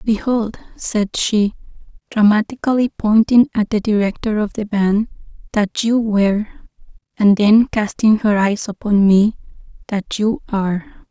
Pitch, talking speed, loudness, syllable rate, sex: 210 Hz, 130 wpm, -17 LUFS, 4.3 syllables/s, female